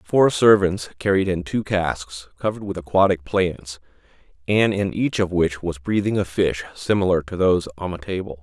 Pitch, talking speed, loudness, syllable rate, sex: 90 Hz, 180 wpm, -21 LUFS, 5.0 syllables/s, male